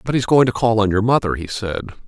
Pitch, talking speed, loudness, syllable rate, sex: 110 Hz, 290 wpm, -18 LUFS, 6.4 syllables/s, male